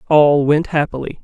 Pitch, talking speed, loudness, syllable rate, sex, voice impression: 145 Hz, 145 wpm, -15 LUFS, 4.8 syllables/s, male, very masculine, very adult-like, old, slightly thick, relaxed, slightly powerful, slightly bright, slightly soft, slightly muffled, slightly fluent, slightly raspy, slightly cool, intellectual, slightly refreshing, very sincere, calm, slightly mature, slightly friendly, slightly reassuring, very unique, slightly elegant, wild, slightly sweet, lively, kind, slightly intense, slightly modest